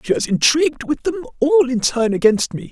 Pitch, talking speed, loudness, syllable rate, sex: 245 Hz, 220 wpm, -17 LUFS, 6.1 syllables/s, male